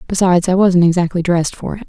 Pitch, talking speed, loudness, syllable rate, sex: 180 Hz, 225 wpm, -14 LUFS, 7.0 syllables/s, female